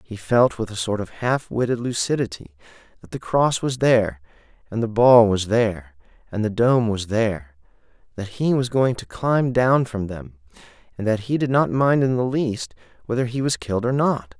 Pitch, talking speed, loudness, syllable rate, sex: 115 Hz, 200 wpm, -21 LUFS, 5.0 syllables/s, male